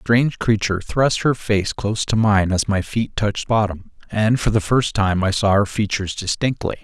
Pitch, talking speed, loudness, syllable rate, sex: 105 Hz, 210 wpm, -19 LUFS, 5.4 syllables/s, male